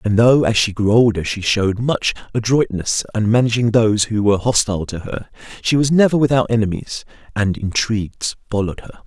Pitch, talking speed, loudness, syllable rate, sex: 110 Hz, 180 wpm, -17 LUFS, 5.8 syllables/s, male